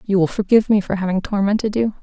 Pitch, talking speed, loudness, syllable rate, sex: 200 Hz, 235 wpm, -18 LUFS, 6.9 syllables/s, female